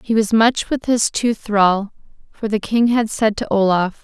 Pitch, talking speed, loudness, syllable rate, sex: 215 Hz, 210 wpm, -17 LUFS, 4.2 syllables/s, female